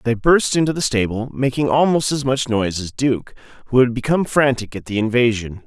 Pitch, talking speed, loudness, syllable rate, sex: 125 Hz, 200 wpm, -18 LUFS, 5.6 syllables/s, male